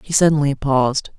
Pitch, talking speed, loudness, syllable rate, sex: 145 Hz, 150 wpm, -17 LUFS, 5.7 syllables/s, female